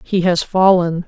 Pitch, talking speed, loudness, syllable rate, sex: 180 Hz, 165 wpm, -15 LUFS, 4.1 syllables/s, female